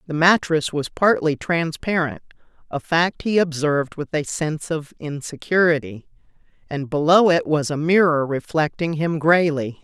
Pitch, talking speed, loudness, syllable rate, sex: 160 Hz, 140 wpm, -20 LUFS, 4.6 syllables/s, female